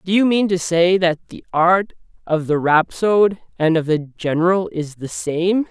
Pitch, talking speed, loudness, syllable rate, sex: 175 Hz, 190 wpm, -18 LUFS, 4.3 syllables/s, male